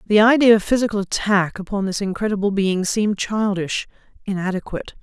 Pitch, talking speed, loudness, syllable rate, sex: 200 Hz, 130 wpm, -19 LUFS, 5.9 syllables/s, female